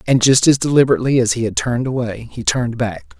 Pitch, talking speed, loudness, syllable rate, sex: 120 Hz, 225 wpm, -16 LUFS, 6.6 syllables/s, male